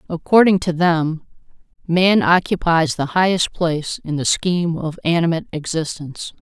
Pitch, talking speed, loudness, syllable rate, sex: 170 Hz, 130 wpm, -18 LUFS, 4.9 syllables/s, female